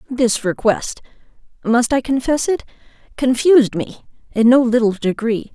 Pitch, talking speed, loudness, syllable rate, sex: 240 Hz, 110 wpm, -17 LUFS, 4.6 syllables/s, female